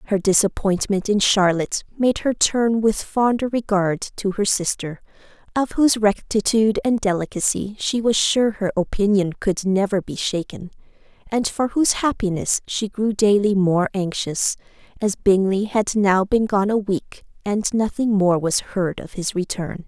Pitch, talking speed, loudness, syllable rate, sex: 205 Hz, 155 wpm, -20 LUFS, 4.5 syllables/s, female